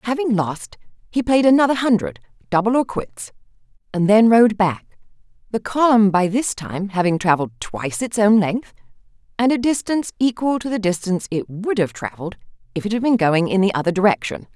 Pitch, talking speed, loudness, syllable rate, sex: 210 Hz, 180 wpm, -19 LUFS, 5.6 syllables/s, female